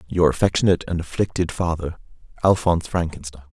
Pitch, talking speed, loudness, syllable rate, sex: 85 Hz, 120 wpm, -21 LUFS, 6.3 syllables/s, male